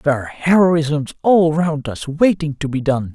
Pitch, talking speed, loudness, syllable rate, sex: 150 Hz, 190 wpm, -17 LUFS, 4.6 syllables/s, male